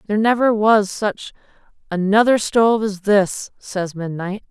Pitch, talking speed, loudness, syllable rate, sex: 205 Hz, 135 wpm, -18 LUFS, 4.4 syllables/s, female